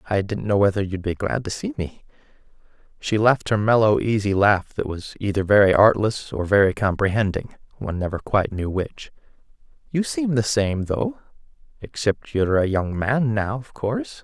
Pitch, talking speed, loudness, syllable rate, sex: 105 Hz, 175 wpm, -21 LUFS, 5.3 syllables/s, male